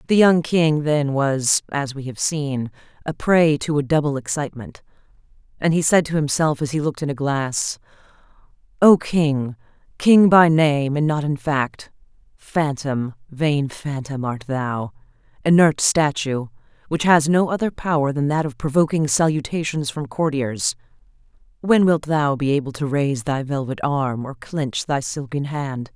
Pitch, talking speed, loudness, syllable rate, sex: 145 Hz, 155 wpm, -20 LUFS, 4.4 syllables/s, female